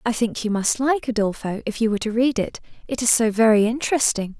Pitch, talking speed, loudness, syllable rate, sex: 230 Hz, 230 wpm, -21 LUFS, 6.1 syllables/s, female